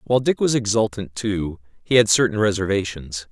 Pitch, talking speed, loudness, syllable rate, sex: 105 Hz, 165 wpm, -20 LUFS, 5.4 syllables/s, male